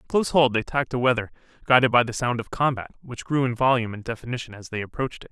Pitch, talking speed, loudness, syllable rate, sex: 120 Hz, 235 wpm, -23 LUFS, 7.4 syllables/s, male